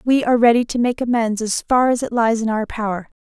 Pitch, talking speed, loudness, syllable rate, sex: 230 Hz, 260 wpm, -18 LUFS, 6.0 syllables/s, female